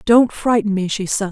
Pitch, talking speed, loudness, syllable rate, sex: 210 Hz, 230 wpm, -17 LUFS, 5.0 syllables/s, female